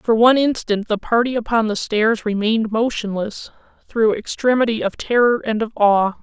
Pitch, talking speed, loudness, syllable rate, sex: 220 Hz, 165 wpm, -18 LUFS, 5.0 syllables/s, female